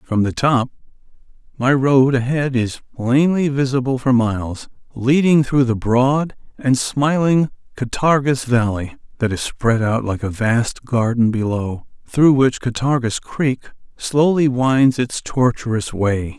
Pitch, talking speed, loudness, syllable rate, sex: 125 Hz, 135 wpm, -18 LUFS, 4.0 syllables/s, male